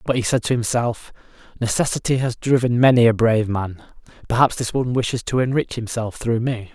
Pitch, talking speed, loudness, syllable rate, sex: 120 Hz, 185 wpm, -20 LUFS, 5.8 syllables/s, male